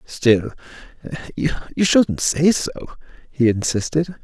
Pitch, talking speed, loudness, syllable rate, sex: 140 Hz, 100 wpm, -19 LUFS, 3.8 syllables/s, male